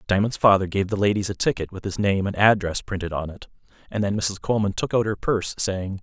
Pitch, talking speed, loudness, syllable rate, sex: 100 Hz, 240 wpm, -23 LUFS, 6.1 syllables/s, male